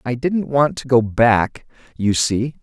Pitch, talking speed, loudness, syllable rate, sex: 125 Hz, 185 wpm, -18 LUFS, 3.7 syllables/s, male